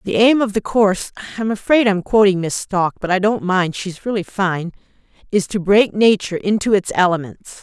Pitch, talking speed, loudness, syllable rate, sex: 200 Hz, 180 wpm, -17 LUFS, 5.4 syllables/s, female